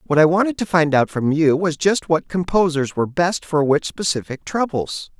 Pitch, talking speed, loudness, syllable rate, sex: 165 Hz, 210 wpm, -19 LUFS, 5.0 syllables/s, male